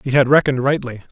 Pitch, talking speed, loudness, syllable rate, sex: 135 Hz, 215 wpm, -16 LUFS, 7.1 syllables/s, male